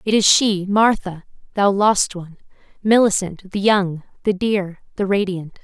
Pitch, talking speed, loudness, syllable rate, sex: 195 Hz, 150 wpm, -18 LUFS, 4.3 syllables/s, female